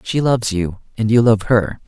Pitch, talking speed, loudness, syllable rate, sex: 110 Hz, 225 wpm, -17 LUFS, 5.0 syllables/s, male